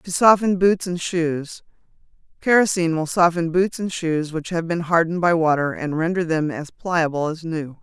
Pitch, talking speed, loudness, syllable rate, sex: 170 Hz, 175 wpm, -20 LUFS, 4.9 syllables/s, female